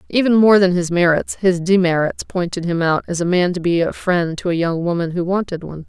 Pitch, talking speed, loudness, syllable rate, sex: 175 Hz, 245 wpm, -17 LUFS, 5.7 syllables/s, female